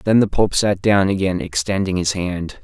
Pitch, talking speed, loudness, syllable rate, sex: 95 Hz, 205 wpm, -18 LUFS, 4.6 syllables/s, male